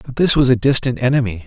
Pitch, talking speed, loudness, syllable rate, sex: 125 Hz, 245 wpm, -15 LUFS, 6.7 syllables/s, male